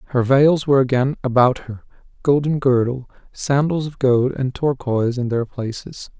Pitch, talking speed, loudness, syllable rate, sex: 130 Hz, 155 wpm, -19 LUFS, 4.8 syllables/s, male